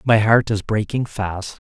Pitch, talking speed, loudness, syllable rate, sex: 105 Hz, 180 wpm, -19 LUFS, 4.0 syllables/s, male